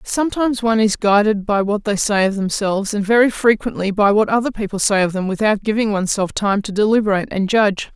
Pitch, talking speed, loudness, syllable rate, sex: 210 Hz, 210 wpm, -17 LUFS, 6.2 syllables/s, female